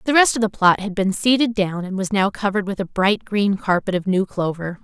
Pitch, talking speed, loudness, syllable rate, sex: 200 Hz, 260 wpm, -19 LUFS, 5.5 syllables/s, female